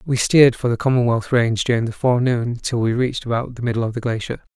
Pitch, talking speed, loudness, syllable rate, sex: 120 Hz, 235 wpm, -19 LUFS, 6.8 syllables/s, male